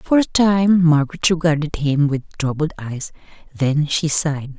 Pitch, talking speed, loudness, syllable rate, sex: 155 Hz, 155 wpm, -18 LUFS, 4.6 syllables/s, female